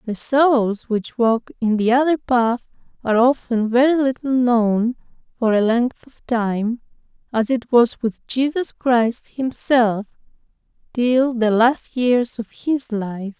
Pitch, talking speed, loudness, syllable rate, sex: 240 Hz, 145 wpm, -19 LUFS, 3.6 syllables/s, female